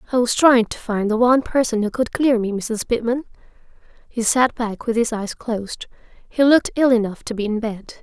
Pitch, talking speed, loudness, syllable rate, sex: 230 Hz, 215 wpm, -19 LUFS, 5.4 syllables/s, female